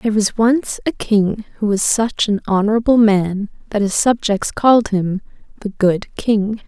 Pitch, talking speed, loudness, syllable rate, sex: 210 Hz, 170 wpm, -16 LUFS, 4.4 syllables/s, female